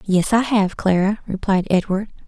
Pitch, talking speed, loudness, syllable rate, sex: 200 Hz, 160 wpm, -19 LUFS, 4.6 syllables/s, female